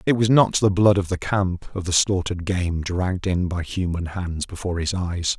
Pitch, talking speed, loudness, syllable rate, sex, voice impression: 90 Hz, 225 wpm, -22 LUFS, 5.0 syllables/s, male, masculine, adult-like, slightly thick, fluent, cool, intellectual, slightly calm, slightly strict